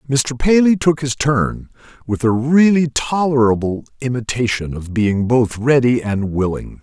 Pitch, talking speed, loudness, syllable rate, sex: 125 Hz, 140 wpm, -17 LUFS, 4.3 syllables/s, male